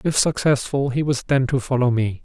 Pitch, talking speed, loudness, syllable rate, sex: 130 Hz, 215 wpm, -20 LUFS, 5.2 syllables/s, male